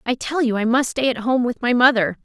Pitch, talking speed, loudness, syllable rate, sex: 245 Hz, 295 wpm, -19 LUFS, 5.7 syllables/s, female